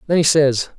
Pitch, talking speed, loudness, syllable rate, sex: 150 Hz, 230 wpm, -15 LUFS, 5.2 syllables/s, male